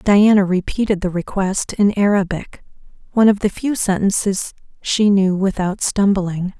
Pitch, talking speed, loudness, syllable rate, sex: 195 Hz, 135 wpm, -17 LUFS, 4.5 syllables/s, female